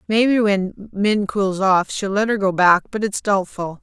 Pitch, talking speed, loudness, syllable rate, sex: 200 Hz, 205 wpm, -19 LUFS, 4.2 syllables/s, female